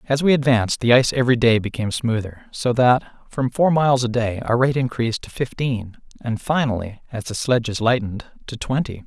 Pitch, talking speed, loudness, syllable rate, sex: 120 Hz, 190 wpm, -20 LUFS, 5.3 syllables/s, male